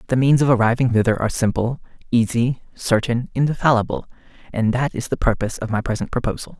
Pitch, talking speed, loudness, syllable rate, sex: 120 Hz, 175 wpm, -20 LUFS, 6.2 syllables/s, male